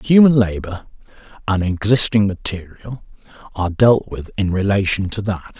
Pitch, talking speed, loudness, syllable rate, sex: 100 Hz, 130 wpm, -17 LUFS, 4.8 syllables/s, male